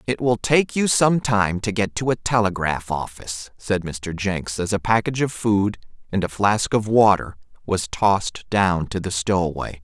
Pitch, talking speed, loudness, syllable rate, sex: 105 Hz, 190 wpm, -21 LUFS, 4.5 syllables/s, male